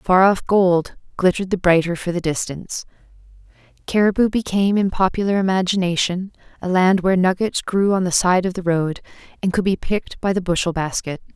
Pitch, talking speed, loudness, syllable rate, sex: 185 Hz, 175 wpm, -19 LUFS, 5.7 syllables/s, female